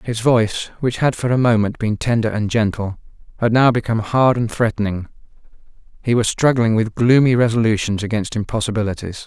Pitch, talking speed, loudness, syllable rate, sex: 115 Hz, 160 wpm, -18 LUFS, 5.7 syllables/s, male